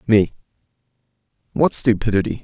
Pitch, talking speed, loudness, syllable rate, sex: 110 Hz, 75 wpm, -18 LUFS, 5.5 syllables/s, male